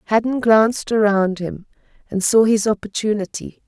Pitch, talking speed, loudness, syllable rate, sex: 210 Hz, 130 wpm, -18 LUFS, 5.0 syllables/s, female